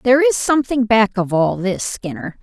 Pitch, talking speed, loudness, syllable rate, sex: 210 Hz, 200 wpm, -17 LUFS, 5.2 syllables/s, female